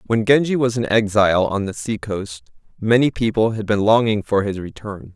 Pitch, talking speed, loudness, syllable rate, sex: 110 Hz, 200 wpm, -18 LUFS, 5.2 syllables/s, male